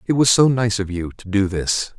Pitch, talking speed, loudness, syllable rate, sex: 110 Hz, 275 wpm, -19 LUFS, 5.0 syllables/s, male